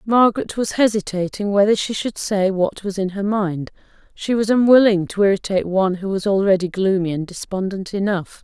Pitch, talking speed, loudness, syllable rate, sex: 200 Hz, 180 wpm, -19 LUFS, 5.4 syllables/s, female